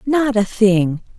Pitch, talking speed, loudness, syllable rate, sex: 215 Hz, 150 wpm, -16 LUFS, 3.2 syllables/s, female